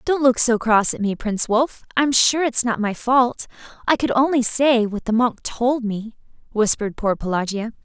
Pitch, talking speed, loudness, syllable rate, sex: 235 Hz, 200 wpm, -19 LUFS, 4.7 syllables/s, female